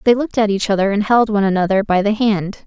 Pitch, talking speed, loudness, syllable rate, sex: 210 Hz, 270 wpm, -16 LUFS, 7.0 syllables/s, female